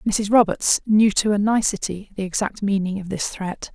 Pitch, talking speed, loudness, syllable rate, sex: 200 Hz, 190 wpm, -20 LUFS, 4.8 syllables/s, female